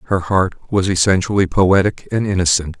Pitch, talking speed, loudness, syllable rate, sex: 90 Hz, 150 wpm, -16 LUFS, 5.0 syllables/s, male